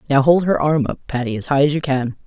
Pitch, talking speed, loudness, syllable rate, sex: 140 Hz, 290 wpm, -18 LUFS, 6.3 syllables/s, female